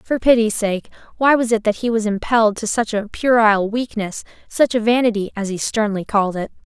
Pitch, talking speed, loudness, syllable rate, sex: 220 Hz, 195 wpm, -18 LUFS, 5.6 syllables/s, female